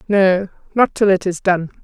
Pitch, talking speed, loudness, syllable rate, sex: 190 Hz, 195 wpm, -17 LUFS, 4.6 syllables/s, female